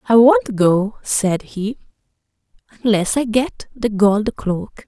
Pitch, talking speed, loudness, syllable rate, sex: 215 Hz, 135 wpm, -18 LUFS, 3.5 syllables/s, female